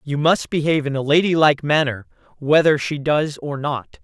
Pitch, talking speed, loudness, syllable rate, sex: 145 Hz, 195 wpm, -18 LUFS, 5.0 syllables/s, female